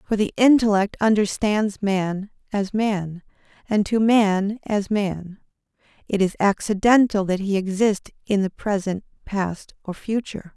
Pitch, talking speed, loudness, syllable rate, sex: 205 Hz, 135 wpm, -21 LUFS, 4.2 syllables/s, female